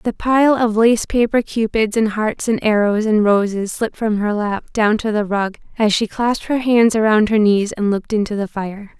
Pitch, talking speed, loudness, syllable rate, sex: 215 Hz, 220 wpm, -17 LUFS, 4.9 syllables/s, female